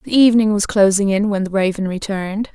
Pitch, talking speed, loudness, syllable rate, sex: 200 Hz, 210 wpm, -16 LUFS, 6.0 syllables/s, female